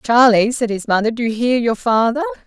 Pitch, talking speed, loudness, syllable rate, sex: 230 Hz, 220 wpm, -16 LUFS, 5.6 syllables/s, female